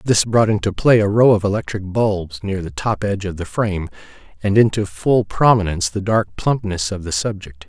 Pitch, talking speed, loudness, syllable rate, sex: 100 Hz, 205 wpm, -18 LUFS, 5.3 syllables/s, male